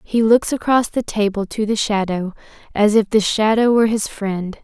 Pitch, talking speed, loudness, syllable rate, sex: 215 Hz, 195 wpm, -17 LUFS, 4.9 syllables/s, female